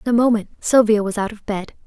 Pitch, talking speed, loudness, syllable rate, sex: 215 Hz, 255 wpm, -19 LUFS, 6.3 syllables/s, female